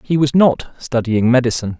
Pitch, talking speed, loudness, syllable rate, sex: 125 Hz, 165 wpm, -15 LUFS, 5.5 syllables/s, male